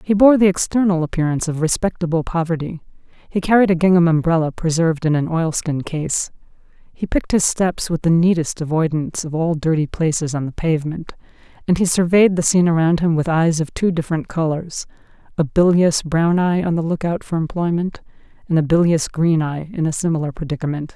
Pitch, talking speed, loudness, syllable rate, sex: 165 Hz, 180 wpm, -18 LUFS, 5.7 syllables/s, female